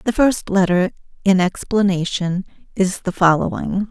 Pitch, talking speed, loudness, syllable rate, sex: 190 Hz, 125 wpm, -18 LUFS, 4.5 syllables/s, female